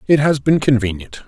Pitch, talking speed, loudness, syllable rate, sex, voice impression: 130 Hz, 190 wpm, -16 LUFS, 5.5 syllables/s, male, masculine, very adult-like, cool, slightly intellectual, slightly refreshing